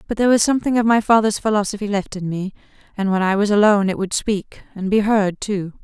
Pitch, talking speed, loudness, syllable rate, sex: 205 Hz, 235 wpm, -18 LUFS, 6.2 syllables/s, female